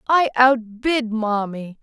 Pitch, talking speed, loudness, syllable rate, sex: 235 Hz, 100 wpm, -19 LUFS, 3.1 syllables/s, female